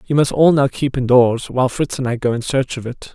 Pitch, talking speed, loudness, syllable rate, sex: 130 Hz, 305 wpm, -17 LUFS, 5.6 syllables/s, male